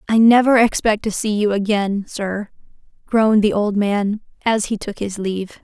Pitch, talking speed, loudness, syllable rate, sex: 210 Hz, 180 wpm, -18 LUFS, 4.8 syllables/s, female